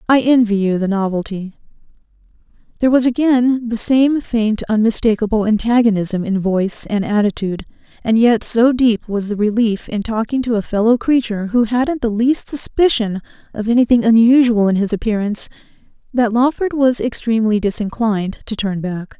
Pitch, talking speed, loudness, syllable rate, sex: 225 Hz, 155 wpm, -16 LUFS, 5.3 syllables/s, female